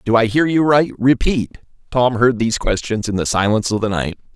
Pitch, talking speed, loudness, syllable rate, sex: 120 Hz, 220 wpm, -17 LUFS, 5.5 syllables/s, male